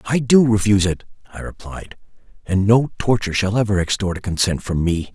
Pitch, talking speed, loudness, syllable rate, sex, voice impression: 100 Hz, 185 wpm, -18 LUFS, 5.6 syllables/s, male, masculine, slightly old, thick, slightly halting, sincere, very calm, slightly wild